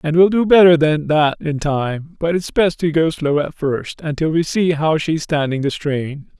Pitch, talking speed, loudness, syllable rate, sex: 155 Hz, 235 wpm, -17 LUFS, 4.6 syllables/s, male